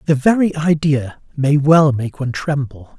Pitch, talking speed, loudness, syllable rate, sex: 145 Hz, 160 wpm, -16 LUFS, 4.4 syllables/s, male